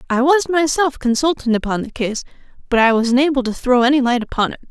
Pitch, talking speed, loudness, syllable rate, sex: 260 Hz, 215 wpm, -17 LUFS, 6.3 syllables/s, female